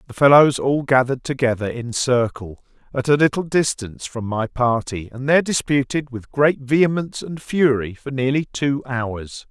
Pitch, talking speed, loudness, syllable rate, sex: 130 Hz, 165 wpm, -19 LUFS, 4.9 syllables/s, male